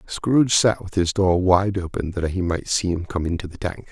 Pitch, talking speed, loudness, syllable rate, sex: 90 Hz, 245 wpm, -21 LUFS, 5.0 syllables/s, male